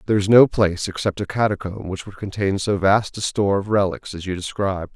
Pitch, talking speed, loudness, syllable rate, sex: 100 Hz, 230 wpm, -20 LUFS, 6.1 syllables/s, male